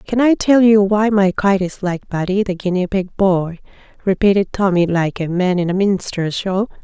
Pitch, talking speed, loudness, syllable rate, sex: 190 Hz, 200 wpm, -16 LUFS, 4.7 syllables/s, female